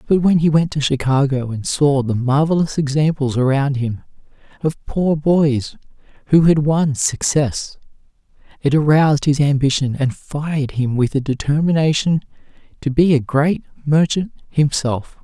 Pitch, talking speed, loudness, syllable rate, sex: 145 Hz, 140 wpm, -17 LUFS, 4.5 syllables/s, male